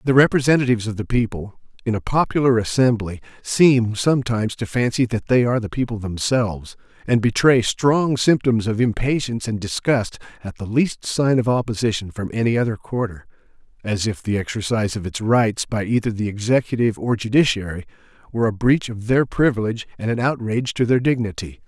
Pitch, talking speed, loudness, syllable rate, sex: 115 Hz, 170 wpm, -20 LUFS, 5.8 syllables/s, male